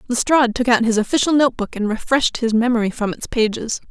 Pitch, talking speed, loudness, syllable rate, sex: 235 Hz, 200 wpm, -18 LUFS, 6.6 syllables/s, female